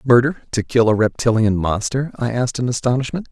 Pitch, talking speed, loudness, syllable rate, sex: 120 Hz, 180 wpm, -18 LUFS, 5.9 syllables/s, male